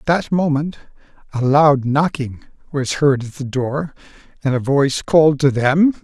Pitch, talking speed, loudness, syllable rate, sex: 145 Hz, 170 wpm, -17 LUFS, 4.5 syllables/s, male